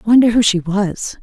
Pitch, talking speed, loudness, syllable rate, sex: 205 Hz, 245 wpm, -15 LUFS, 5.8 syllables/s, female